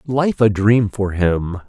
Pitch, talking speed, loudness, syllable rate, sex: 105 Hz, 180 wpm, -17 LUFS, 3.3 syllables/s, male